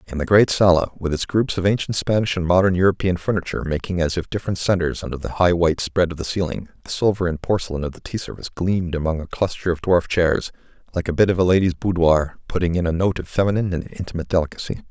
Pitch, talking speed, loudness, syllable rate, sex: 90 Hz, 235 wpm, -21 LUFS, 6.8 syllables/s, male